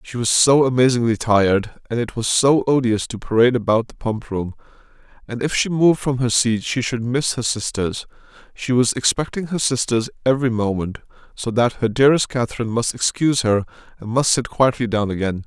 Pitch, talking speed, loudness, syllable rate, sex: 120 Hz, 190 wpm, -19 LUFS, 5.6 syllables/s, male